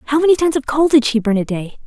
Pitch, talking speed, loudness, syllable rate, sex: 270 Hz, 320 wpm, -15 LUFS, 6.3 syllables/s, female